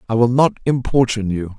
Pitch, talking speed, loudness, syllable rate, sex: 115 Hz, 190 wpm, -17 LUFS, 6.3 syllables/s, male